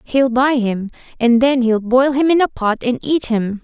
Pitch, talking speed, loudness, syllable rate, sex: 250 Hz, 230 wpm, -16 LUFS, 4.4 syllables/s, female